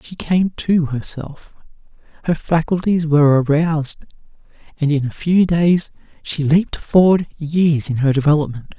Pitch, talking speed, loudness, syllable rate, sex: 155 Hz, 135 wpm, -17 LUFS, 4.6 syllables/s, male